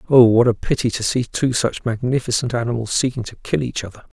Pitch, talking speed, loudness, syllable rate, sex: 120 Hz, 215 wpm, -19 LUFS, 6.0 syllables/s, male